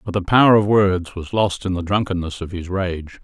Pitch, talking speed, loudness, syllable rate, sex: 95 Hz, 240 wpm, -19 LUFS, 5.1 syllables/s, male